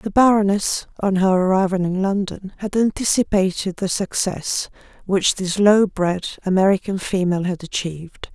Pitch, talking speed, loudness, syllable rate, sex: 190 Hz, 135 wpm, -19 LUFS, 4.8 syllables/s, female